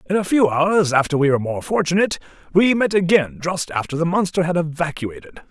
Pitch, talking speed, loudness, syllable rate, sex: 170 Hz, 195 wpm, -19 LUFS, 6.0 syllables/s, male